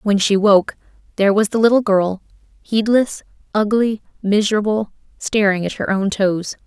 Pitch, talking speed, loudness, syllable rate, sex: 205 Hz, 145 wpm, -17 LUFS, 4.8 syllables/s, female